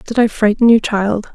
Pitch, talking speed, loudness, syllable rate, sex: 220 Hz, 225 wpm, -14 LUFS, 4.7 syllables/s, female